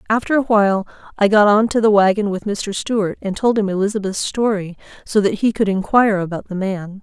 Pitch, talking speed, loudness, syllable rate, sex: 205 Hz, 215 wpm, -17 LUFS, 5.8 syllables/s, female